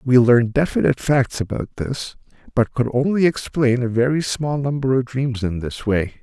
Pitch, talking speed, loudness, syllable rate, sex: 125 Hz, 185 wpm, -20 LUFS, 5.0 syllables/s, male